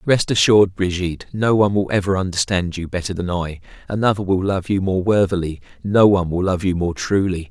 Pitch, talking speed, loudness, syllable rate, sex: 95 Hz, 200 wpm, -19 LUFS, 5.8 syllables/s, male